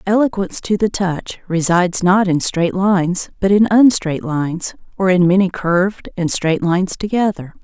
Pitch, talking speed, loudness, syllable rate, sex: 185 Hz, 165 wpm, -16 LUFS, 4.8 syllables/s, female